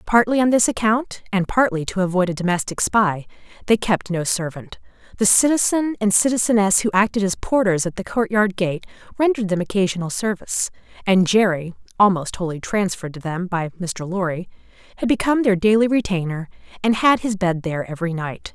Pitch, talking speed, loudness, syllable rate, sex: 195 Hz, 170 wpm, -20 LUFS, 5.0 syllables/s, female